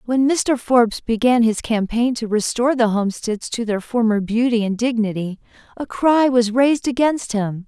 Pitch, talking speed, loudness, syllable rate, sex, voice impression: 235 Hz, 170 wpm, -18 LUFS, 4.9 syllables/s, female, very feminine, young, very thin, slightly tensed, weak, bright, soft, very clear, fluent, slightly raspy, very cute, very intellectual, refreshing, sincere, very calm, very friendly, very reassuring, very unique, very elegant, slightly wild, very sweet, lively, very kind, slightly sharp